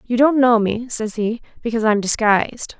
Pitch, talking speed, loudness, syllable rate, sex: 230 Hz, 195 wpm, -18 LUFS, 5.3 syllables/s, female